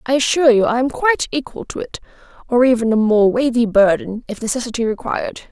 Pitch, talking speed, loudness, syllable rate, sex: 245 Hz, 195 wpm, -17 LUFS, 6.2 syllables/s, female